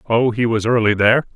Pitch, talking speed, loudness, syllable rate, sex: 115 Hz, 220 wpm, -16 LUFS, 6.4 syllables/s, male